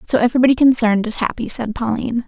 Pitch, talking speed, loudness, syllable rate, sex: 235 Hz, 185 wpm, -16 LUFS, 7.4 syllables/s, female